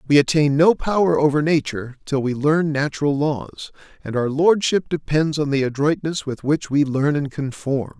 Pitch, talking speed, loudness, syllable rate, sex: 145 Hz, 180 wpm, -20 LUFS, 4.9 syllables/s, male